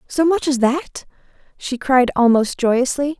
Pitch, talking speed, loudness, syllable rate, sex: 265 Hz, 150 wpm, -17 LUFS, 4.0 syllables/s, female